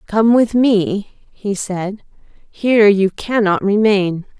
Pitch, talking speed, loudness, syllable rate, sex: 210 Hz, 125 wpm, -15 LUFS, 3.2 syllables/s, female